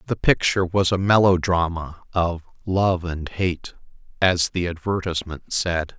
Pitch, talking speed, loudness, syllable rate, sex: 90 Hz, 130 wpm, -22 LUFS, 4.4 syllables/s, male